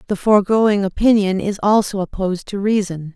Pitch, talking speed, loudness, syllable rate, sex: 200 Hz, 150 wpm, -17 LUFS, 5.4 syllables/s, female